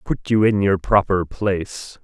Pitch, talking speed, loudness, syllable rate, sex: 95 Hz, 175 wpm, -19 LUFS, 4.2 syllables/s, male